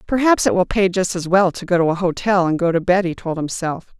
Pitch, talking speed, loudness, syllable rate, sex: 180 Hz, 285 wpm, -18 LUFS, 5.8 syllables/s, female